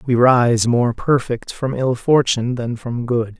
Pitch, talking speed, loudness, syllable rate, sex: 120 Hz, 175 wpm, -18 LUFS, 4.0 syllables/s, male